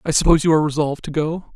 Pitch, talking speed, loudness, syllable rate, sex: 155 Hz, 270 wpm, -18 LUFS, 8.3 syllables/s, male